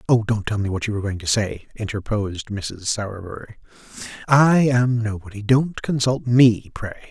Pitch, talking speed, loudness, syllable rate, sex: 110 Hz, 170 wpm, -20 LUFS, 5.1 syllables/s, male